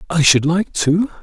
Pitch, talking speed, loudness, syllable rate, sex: 165 Hz, 195 wpm, -15 LUFS, 4.4 syllables/s, male